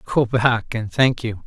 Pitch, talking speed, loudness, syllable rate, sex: 115 Hz, 205 wpm, -20 LUFS, 3.7 syllables/s, male